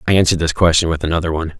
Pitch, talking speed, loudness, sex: 80 Hz, 265 wpm, -16 LUFS, male